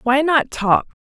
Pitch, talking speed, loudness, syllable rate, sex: 270 Hz, 175 wpm, -17 LUFS, 3.6 syllables/s, female